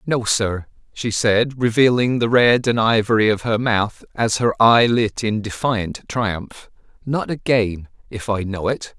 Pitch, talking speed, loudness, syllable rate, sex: 110 Hz, 165 wpm, -18 LUFS, 3.9 syllables/s, male